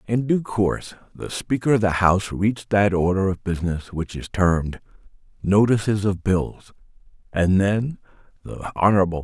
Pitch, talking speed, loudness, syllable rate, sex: 100 Hz, 150 wpm, -21 LUFS, 5.0 syllables/s, male